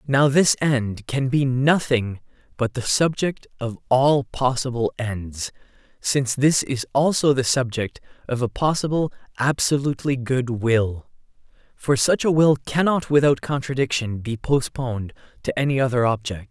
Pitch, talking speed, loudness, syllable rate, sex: 130 Hz, 140 wpm, -21 LUFS, 4.5 syllables/s, male